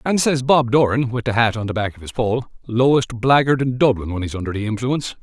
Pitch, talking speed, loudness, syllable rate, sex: 120 Hz, 255 wpm, -19 LUFS, 5.9 syllables/s, male